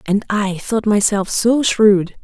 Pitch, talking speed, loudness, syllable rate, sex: 210 Hz, 160 wpm, -16 LUFS, 3.4 syllables/s, female